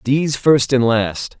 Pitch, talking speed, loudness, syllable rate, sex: 125 Hz, 170 wpm, -16 LUFS, 3.9 syllables/s, male